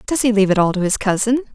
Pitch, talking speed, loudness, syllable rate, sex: 215 Hz, 310 wpm, -17 LUFS, 7.9 syllables/s, female